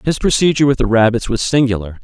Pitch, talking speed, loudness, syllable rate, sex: 125 Hz, 205 wpm, -14 LUFS, 6.8 syllables/s, male